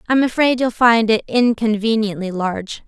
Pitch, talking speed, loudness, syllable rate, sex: 225 Hz, 145 wpm, -17 LUFS, 4.9 syllables/s, female